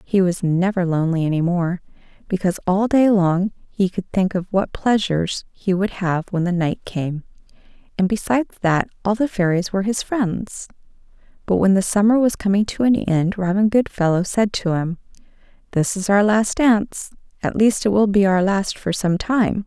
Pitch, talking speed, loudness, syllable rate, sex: 195 Hz, 185 wpm, -19 LUFS, 5.1 syllables/s, female